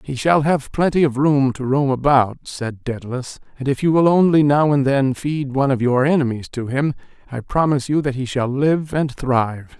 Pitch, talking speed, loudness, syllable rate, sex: 135 Hz, 215 wpm, -18 LUFS, 5.1 syllables/s, male